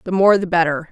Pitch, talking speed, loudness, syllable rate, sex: 175 Hz, 260 wpm, -16 LUFS, 6.3 syllables/s, female